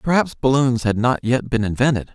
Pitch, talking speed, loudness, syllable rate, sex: 125 Hz, 195 wpm, -19 LUFS, 5.4 syllables/s, male